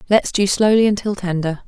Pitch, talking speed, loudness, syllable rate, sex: 200 Hz, 180 wpm, -17 LUFS, 5.5 syllables/s, female